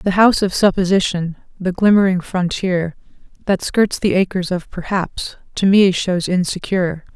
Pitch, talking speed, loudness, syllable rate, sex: 185 Hz, 145 wpm, -17 LUFS, 4.7 syllables/s, female